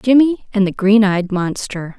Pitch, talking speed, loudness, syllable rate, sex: 210 Hz, 180 wpm, -16 LUFS, 4.3 syllables/s, female